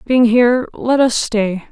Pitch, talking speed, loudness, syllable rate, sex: 235 Hz, 175 wpm, -14 LUFS, 4.0 syllables/s, female